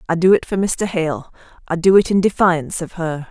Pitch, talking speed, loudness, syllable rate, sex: 175 Hz, 235 wpm, -17 LUFS, 5.4 syllables/s, female